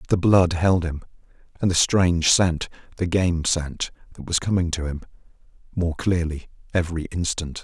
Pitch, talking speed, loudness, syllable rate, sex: 85 Hz, 140 wpm, -22 LUFS, 4.8 syllables/s, male